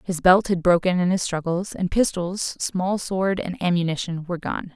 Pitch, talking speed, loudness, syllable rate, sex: 180 Hz, 190 wpm, -22 LUFS, 4.8 syllables/s, female